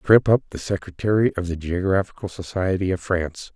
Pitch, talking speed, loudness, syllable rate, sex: 95 Hz, 170 wpm, -22 LUFS, 5.7 syllables/s, male